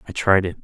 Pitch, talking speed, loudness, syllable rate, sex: 95 Hz, 285 wpm, -19 LUFS, 7.0 syllables/s, male